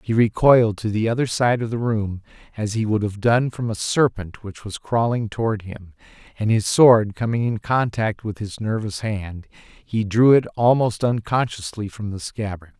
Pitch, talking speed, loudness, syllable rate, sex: 110 Hz, 190 wpm, -21 LUFS, 4.7 syllables/s, male